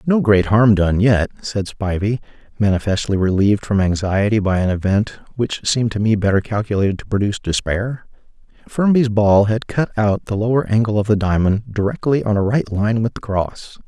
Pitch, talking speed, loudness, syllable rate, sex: 105 Hz, 180 wpm, -18 LUFS, 5.3 syllables/s, male